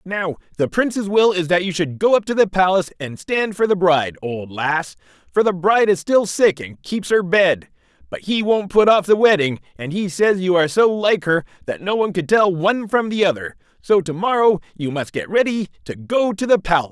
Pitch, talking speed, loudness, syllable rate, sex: 185 Hz, 235 wpm, -18 LUFS, 5.4 syllables/s, male